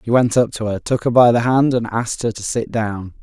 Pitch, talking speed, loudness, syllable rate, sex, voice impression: 115 Hz, 295 wpm, -17 LUFS, 5.5 syllables/s, male, masculine, middle-aged, slightly relaxed, powerful, clear, slightly halting, slightly raspy, calm, slightly mature, friendly, reassuring, wild, slightly lively, kind, slightly modest